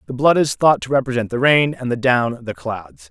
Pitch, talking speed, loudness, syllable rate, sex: 120 Hz, 250 wpm, -17 LUFS, 5.1 syllables/s, male